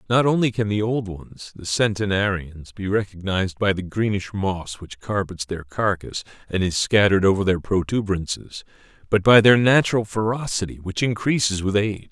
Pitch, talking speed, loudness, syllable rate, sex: 100 Hz, 165 wpm, -21 LUFS, 5.2 syllables/s, male